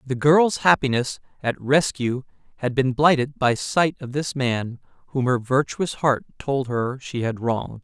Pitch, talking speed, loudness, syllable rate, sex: 130 Hz, 170 wpm, -22 LUFS, 4.3 syllables/s, male